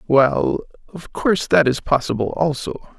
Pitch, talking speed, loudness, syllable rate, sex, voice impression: 140 Hz, 140 wpm, -19 LUFS, 4.2 syllables/s, male, masculine, very adult-like, slightly thick, cool, slightly intellectual, calm, slightly elegant